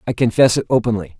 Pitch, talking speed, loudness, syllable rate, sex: 120 Hz, 200 wpm, -16 LUFS, 6.9 syllables/s, male